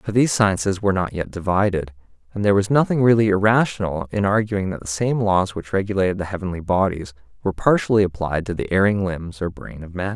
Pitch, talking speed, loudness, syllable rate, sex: 95 Hz, 205 wpm, -20 LUFS, 6.0 syllables/s, male